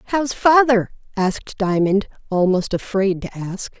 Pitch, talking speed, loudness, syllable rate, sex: 210 Hz, 125 wpm, -19 LUFS, 4.3 syllables/s, female